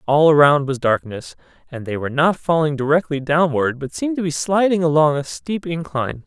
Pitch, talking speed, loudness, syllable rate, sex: 150 Hz, 190 wpm, -18 LUFS, 5.5 syllables/s, male